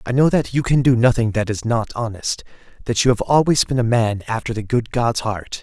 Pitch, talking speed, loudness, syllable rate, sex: 120 Hz, 245 wpm, -19 LUFS, 5.4 syllables/s, male